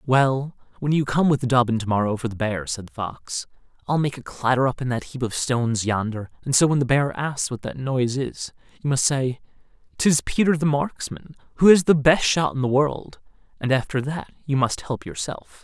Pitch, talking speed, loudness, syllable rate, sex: 130 Hz, 220 wpm, -22 LUFS, 5.1 syllables/s, male